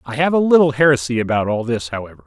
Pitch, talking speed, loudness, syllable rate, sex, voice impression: 130 Hz, 240 wpm, -16 LUFS, 6.9 syllables/s, male, very masculine, very adult-like, middle-aged, very thick, tensed, powerful, bright, slightly hard, clear, fluent, slightly raspy, cool, very intellectual, slightly refreshing, very sincere, calm, very mature, friendly, very reassuring, slightly unique, very elegant, wild, slightly sweet, lively, kind, slightly modest